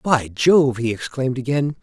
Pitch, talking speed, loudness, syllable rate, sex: 130 Hz, 165 wpm, -19 LUFS, 4.6 syllables/s, male